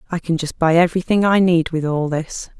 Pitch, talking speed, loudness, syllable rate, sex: 170 Hz, 230 wpm, -17 LUFS, 5.7 syllables/s, female